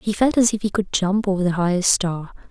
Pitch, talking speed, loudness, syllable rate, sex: 195 Hz, 265 wpm, -20 LUFS, 5.9 syllables/s, female